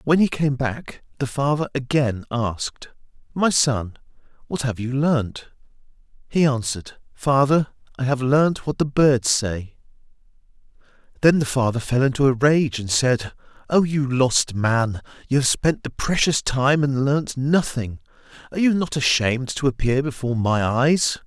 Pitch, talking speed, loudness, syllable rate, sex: 135 Hz, 155 wpm, -21 LUFS, 4.4 syllables/s, male